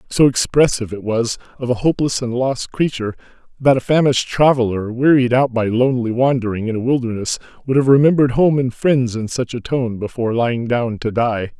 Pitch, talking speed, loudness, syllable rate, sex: 125 Hz, 190 wpm, -17 LUFS, 5.9 syllables/s, male